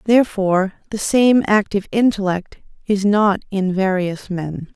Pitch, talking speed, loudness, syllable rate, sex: 200 Hz, 125 wpm, -18 LUFS, 4.5 syllables/s, female